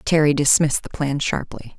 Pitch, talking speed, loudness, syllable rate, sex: 145 Hz, 170 wpm, -19 LUFS, 5.5 syllables/s, female